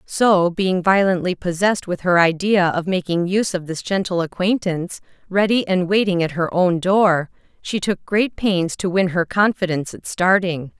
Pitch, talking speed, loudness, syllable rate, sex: 185 Hz, 170 wpm, -19 LUFS, 4.8 syllables/s, female